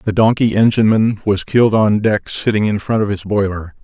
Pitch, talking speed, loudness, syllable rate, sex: 105 Hz, 205 wpm, -15 LUFS, 5.5 syllables/s, male